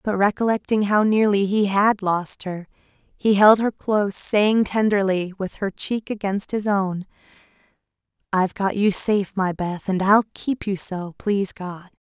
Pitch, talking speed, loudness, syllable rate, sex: 200 Hz, 165 wpm, -21 LUFS, 4.3 syllables/s, female